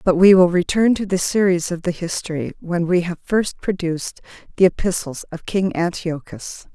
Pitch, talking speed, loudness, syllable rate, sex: 175 Hz, 180 wpm, -19 LUFS, 5.0 syllables/s, female